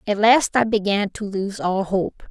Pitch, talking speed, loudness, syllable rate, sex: 205 Hz, 210 wpm, -20 LUFS, 4.2 syllables/s, female